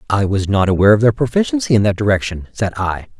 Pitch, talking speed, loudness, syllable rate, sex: 105 Hz, 225 wpm, -16 LUFS, 6.5 syllables/s, male